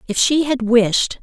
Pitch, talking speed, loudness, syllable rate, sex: 240 Hz, 195 wpm, -16 LUFS, 4.9 syllables/s, female